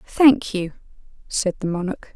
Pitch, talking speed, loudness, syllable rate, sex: 205 Hz, 140 wpm, -21 LUFS, 4.1 syllables/s, female